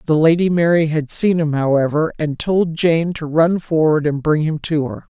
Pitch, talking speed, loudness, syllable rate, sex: 160 Hz, 210 wpm, -17 LUFS, 4.7 syllables/s, male